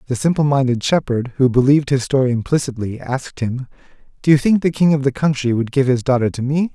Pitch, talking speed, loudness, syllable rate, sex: 135 Hz, 220 wpm, -17 LUFS, 6.2 syllables/s, male